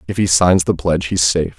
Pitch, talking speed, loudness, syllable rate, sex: 85 Hz, 265 wpm, -15 LUFS, 6.3 syllables/s, male